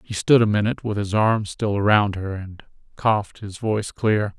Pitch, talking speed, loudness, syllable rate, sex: 105 Hz, 205 wpm, -21 LUFS, 5.1 syllables/s, male